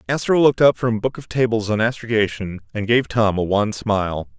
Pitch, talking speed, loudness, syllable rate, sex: 110 Hz, 220 wpm, -19 LUFS, 5.7 syllables/s, male